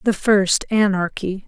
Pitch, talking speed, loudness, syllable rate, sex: 195 Hz, 120 wpm, -18 LUFS, 3.7 syllables/s, female